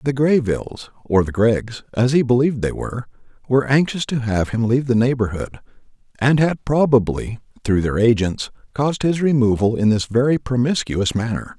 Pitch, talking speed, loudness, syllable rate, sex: 120 Hz, 155 wpm, -19 LUFS, 5.5 syllables/s, male